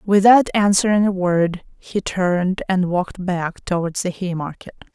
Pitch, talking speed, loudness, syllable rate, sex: 185 Hz, 160 wpm, -19 LUFS, 4.4 syllables/s, female